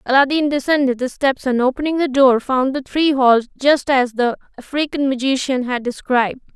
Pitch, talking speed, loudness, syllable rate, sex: 265 Hz, 175 wpm, -17 LUFS, 5.3 syllables/s, female